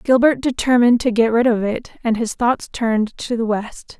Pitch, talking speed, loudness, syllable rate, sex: 235 Hz, 210 wpm, -18 LUFS, 5.0 syllables/s, female